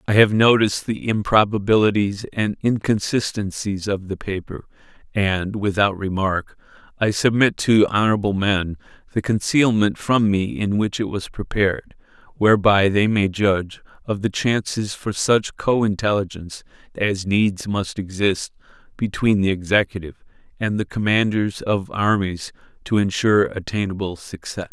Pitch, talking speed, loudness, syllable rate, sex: 100 Hz, 130 wpm, -20 LUFS, 4.7 syllables/s, male